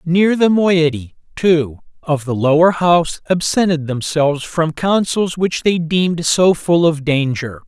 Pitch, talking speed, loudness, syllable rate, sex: 165 Hz, 150 wpm, -15 LUFS, 4.1 syllables/s, male